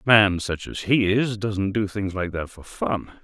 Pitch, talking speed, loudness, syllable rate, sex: 100 Hz, 240 wpm, -23 LUFS, 4.4 syllables/s, male